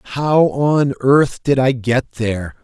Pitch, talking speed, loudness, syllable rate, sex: 130 Hz, 160 wpm, -16 LUFS, 3.6 syllables/s, male